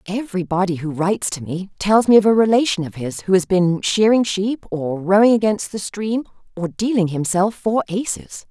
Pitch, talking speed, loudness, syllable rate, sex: 195 Hz, 190 wpm, -18 LUFS, 5.1 syllables/s, female